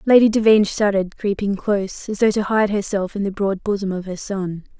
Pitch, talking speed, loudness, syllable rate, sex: 200 Hz, 215 wpm, -19 LUFS, 5.7 syllables/s, female